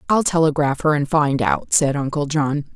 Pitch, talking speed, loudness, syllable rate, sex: 150 Hz, 195 wpm, -19 LUFS, 4.7 syllables/s, female